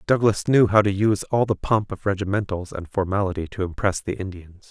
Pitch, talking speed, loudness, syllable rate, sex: 100 Hz, 205 wpm, -22 LUFS, 5.7 syllables/s, male